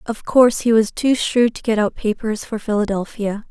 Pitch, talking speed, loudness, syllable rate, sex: 220 Hz, 205 wpm, -18 LUFS, 5.1 syllables/s, female